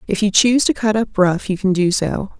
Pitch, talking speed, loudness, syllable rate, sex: 205 Hz, 275 wpm, -16 LUFS, 5.5 syllables/s, female